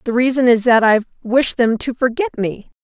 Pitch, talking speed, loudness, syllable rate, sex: 240 Hz, 210 wpm, -16 LUFS, 5.1 syllables/s, female